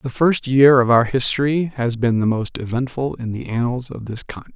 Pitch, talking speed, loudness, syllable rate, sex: 125 Hz, 225 wpm, -18 LUFS, 5.3 syllables/s, male